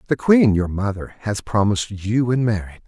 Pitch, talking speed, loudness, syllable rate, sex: 110 Hz, 190 wpm, -20 LUFS, 5.5 syllables/s, male